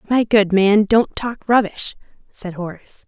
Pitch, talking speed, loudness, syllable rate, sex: 205 Hz, 155 wpm, -17 LUFS, 4.5 syllables/s, female